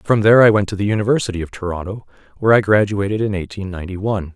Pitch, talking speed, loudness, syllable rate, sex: 100 Hz, 220 wpm, -17 LUFS, 7.6 syllables/s, male